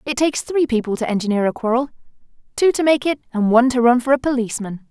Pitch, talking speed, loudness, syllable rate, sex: 250 Hz, 220 wpm, -18 LUFS, 7.0 syllables/s, female